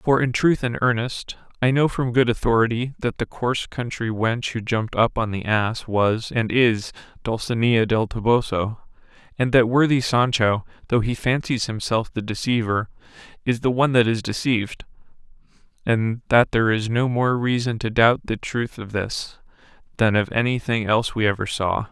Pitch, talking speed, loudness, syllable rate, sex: 115 Hz, 175 wpm, -21 LUFS, 4.9 syllables/s, male